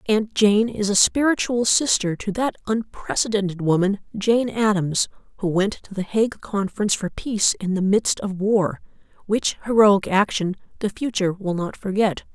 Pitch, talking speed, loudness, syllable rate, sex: 205 Hz, 160 wpm, -21 LUFS, 4.8 syllables/s, female